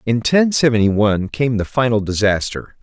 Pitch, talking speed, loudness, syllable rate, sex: 115 Hz, 170 wpm, -16 LUFS, 5.2 syllables/s, male